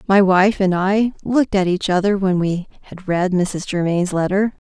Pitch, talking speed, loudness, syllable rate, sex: 190 Hz, 195 wpm, -18 LUFS, 4.9 syllables/s, female